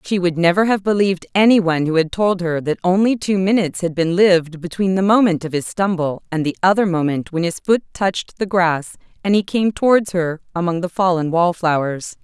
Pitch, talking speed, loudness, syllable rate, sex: 180 Hz, 205 wpm, -17 LUFS, 5.6 syllables/s, female